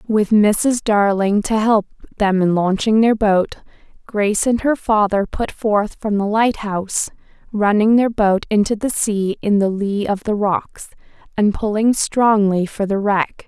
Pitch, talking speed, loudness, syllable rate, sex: 210 Hz, 165 wpm, -17 LUFS, 4.1 syllables/s, female